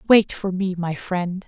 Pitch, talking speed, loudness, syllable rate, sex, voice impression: 185 Hz, 205 wpm, -22 LUFS, 4.0 syllables/s, female, feminine, adult-like, tensed, slightly muffled, slightly raspy, intellectual, calm, friendly, reassuring, elegant, lively